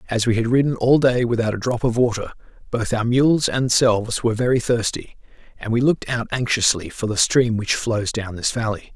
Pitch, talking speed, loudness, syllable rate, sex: 120 Hz, 215 wpm, -20 LUFS, 5.4 syllables/s, male